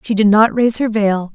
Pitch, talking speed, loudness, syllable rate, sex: 215 Hz, 265 wpm, -14 LUFS, 5.6 syllables/s, female